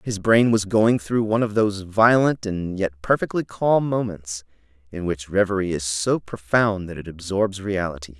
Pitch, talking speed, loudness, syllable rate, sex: 100 Hz, 175 wpm, -21 LUFS, 4.7 syllables/s, male